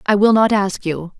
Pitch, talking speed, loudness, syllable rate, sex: 200 Hz, 250 wpm, -16 LUFS, 4.7 syllables/s, female